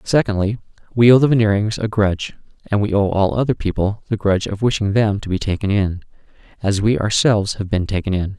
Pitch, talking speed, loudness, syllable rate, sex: 105 Hz, 210 wpm, -18 LUFS, 6.0 syllables/s, male